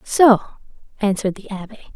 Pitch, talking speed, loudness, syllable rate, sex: 210 Hz, 125 wpm, -17 LUFS, 6.3 syllables/s, female